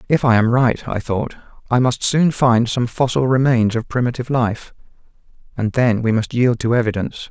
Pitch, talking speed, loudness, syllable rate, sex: 120 Hz, 190 wpm, -17 LUFS, 5.2 syllables/s, male